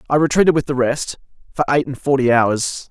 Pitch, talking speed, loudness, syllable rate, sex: 135 Hz, 205 wpm, -17 LUFS, 5.6 syllables/s, male